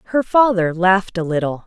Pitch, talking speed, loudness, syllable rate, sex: 190 Hz, 180 wpm, -17 LUFS, 5.7 syllables/s, female